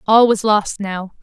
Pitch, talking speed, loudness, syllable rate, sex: 205 Hz, 195 wpm, -16 LUFS, 4.0 syllables/s, female